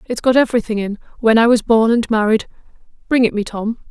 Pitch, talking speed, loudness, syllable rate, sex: 225 Hz, 200 wpm, -16 LUFS, 6.3 syllables/s, female